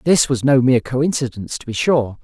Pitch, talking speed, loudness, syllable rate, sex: 130 Hz, 215 wpm, -17 LUFS, 5.7 syllables/s, male